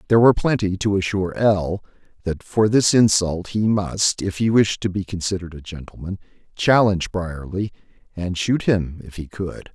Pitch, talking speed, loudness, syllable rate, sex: 95 Hz, 160 wpm, -20 LUFS, 5.1 syllables/s, male